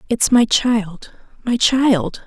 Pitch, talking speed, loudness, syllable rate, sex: 225 Hz, 130 wpm, -16 LUFS, 2.8 syllables/s, female